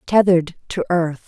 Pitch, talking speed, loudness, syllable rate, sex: 175 Hz, 140 wpm, -19 LUFS, 5.0 syllables/s, female